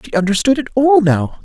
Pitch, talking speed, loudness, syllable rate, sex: 225 Hz, 210 wpm, -14 LUFS, 6.0 syllables/s, female